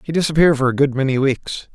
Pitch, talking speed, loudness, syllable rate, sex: 140 Hz, 240 wpm, -17 LUFS, 6.9 syllables/s, male